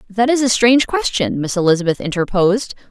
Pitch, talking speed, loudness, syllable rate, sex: 215 Hz, 165 wpm, -16 LUFS, 6.2 syllables/s, female